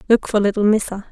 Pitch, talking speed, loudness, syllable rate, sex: 210 Hz, 215 wpm, -17 LUFS, 6.7 syllables/s, female